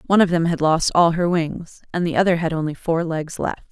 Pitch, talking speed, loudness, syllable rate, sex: 165 Hz, 260 wpm, -20 LUFS, 5.7 syllables/s, female